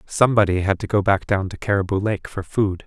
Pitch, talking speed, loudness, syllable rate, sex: 100 Hz, 230 wpm, -20 LUFS, 5.8 syllables/s, male